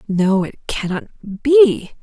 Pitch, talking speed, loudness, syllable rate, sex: 210 Hz, 120 wpm, -17 LUFS, 3.2 syllables/s, female